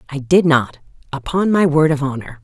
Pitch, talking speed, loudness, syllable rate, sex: 150 Hz, 195 wpm, -16 LUFS, 5.1 syllables/s, female